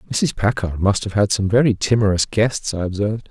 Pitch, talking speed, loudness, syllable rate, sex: 105 Hz, 200 wpm, -19 LUFS, 5.5 syllables/s, male